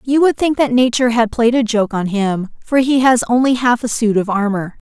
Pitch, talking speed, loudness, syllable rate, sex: 235 Hz, 245 wpm, -15 LUFS, 5.3 syllables/s, female